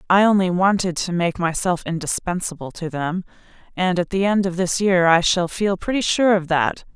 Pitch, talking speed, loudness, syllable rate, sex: 180 Hz, 200 wpm, -20 LUFS, 5.1 syllables/s, female